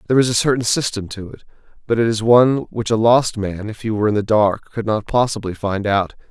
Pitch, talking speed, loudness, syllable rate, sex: 110 Hz, 245 wpm, -18 LUFS, 5.9 syllables/s, male